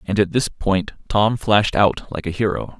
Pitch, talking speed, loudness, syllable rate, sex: 100 Hz, 215 wpm, -19 LUFS, 4.8 syllables/s, male